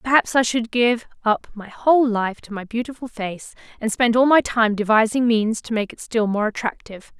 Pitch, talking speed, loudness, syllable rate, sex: 225 Hz, 210 wpm, -20 LUFS, 5.1 syllables/s, female